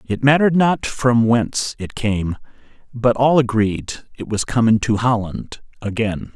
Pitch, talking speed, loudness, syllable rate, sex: 115 Hz, 150 wpm, -18 LUFS, 4.3 syllables/s, male